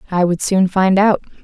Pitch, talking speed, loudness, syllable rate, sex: 190 Hz, 210 wpm, -15 LUFS, 4.9 syllables/s, female